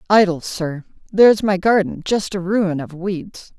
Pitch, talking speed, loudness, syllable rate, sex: 190 Hz, 170 wpm, -18 LUFS, 4.3 syllables/s, female